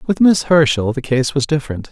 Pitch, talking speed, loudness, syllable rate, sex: 140 Hz, 220 wpm, -15 LUFS, 5.7 syllables/s, male